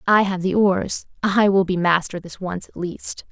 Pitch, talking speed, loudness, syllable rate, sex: 190 Hz, 200 wpm, -21 LUFS, 4.3 syllables/s, female